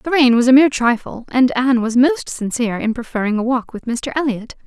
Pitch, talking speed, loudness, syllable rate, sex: 250 Hz, 230 wpm, -16 LUFS, 5.8 syllables/s, female